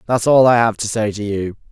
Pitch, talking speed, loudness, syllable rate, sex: 110 Hz, 280 wpm, -16 LUFS, 5.6 syllables/s, male